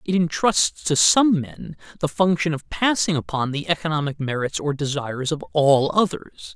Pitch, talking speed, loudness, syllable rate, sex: 155 Hz, 165 wpm, -21 LUFS, 4.8 syllables/s, male